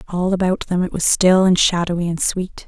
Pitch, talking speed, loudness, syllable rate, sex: 180 Hz, 225 wpm, -17 LUFS, 5.2 syllables/s, female